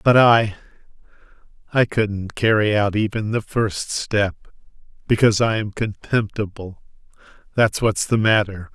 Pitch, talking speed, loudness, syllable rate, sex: 105 Hz, 125 wpm, -20 LUFS, 4.2 syllables/s, male